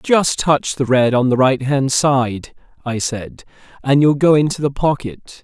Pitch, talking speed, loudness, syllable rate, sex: 135 Hz, 175 wpm, -16 LUFS, 4.1 syllables/s, male